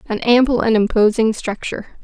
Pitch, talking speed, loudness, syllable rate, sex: 225 Hz, 145 wpm, -16 LUFS, 5.7 syllables/s, female